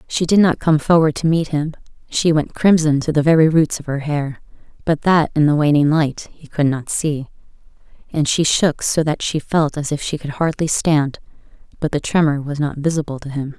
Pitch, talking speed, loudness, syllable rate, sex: 155 Hz, 215 wpm, -18 LUFS, 5.1 syllables/s, female